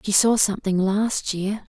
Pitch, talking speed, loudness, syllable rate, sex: 205 Hz, 170 wpm, -21 LUFS, 4.5 syllables/s, female